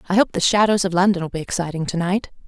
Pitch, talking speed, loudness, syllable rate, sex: 185 Hz, 245 wpm, -20 LUFS, 6.9 syllables/s, female